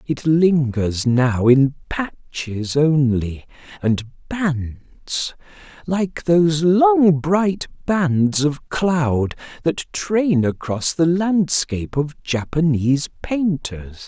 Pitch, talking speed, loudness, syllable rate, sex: 150 Hz, 95 wpm, -19 LUFS, 3.1 syllables/s, male